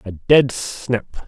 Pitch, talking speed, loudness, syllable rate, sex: 120 Hz, 140 wpm, -18 LUFS, 3.1 syllables/s, male